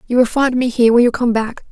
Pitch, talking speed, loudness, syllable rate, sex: 240 Hz, 315 wpm, -15 LUFS, 6.7 syllables/s, female